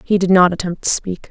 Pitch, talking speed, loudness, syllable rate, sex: 180 Hz, 275 wpm, -15 LUFS, 5.8 syllables/s, female